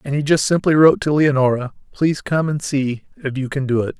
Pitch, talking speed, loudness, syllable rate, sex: 145 Hz, 240 wpm, -18 LUFS, 5.9 syllables/s, male